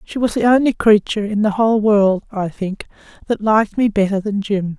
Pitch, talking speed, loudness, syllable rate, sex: 210 Hz, 215 wpm, -17 LUFS, 5.5 syllables/s, female